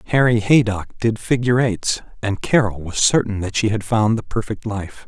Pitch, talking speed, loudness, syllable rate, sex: 110 Hz, 190 wpm, -19 LUFS, 5.1 syllables/s, male